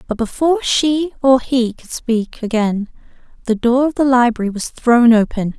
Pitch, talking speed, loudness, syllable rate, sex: 245 Hz, 170 wpm, -16 LUFS, 4.6 syllables/s, female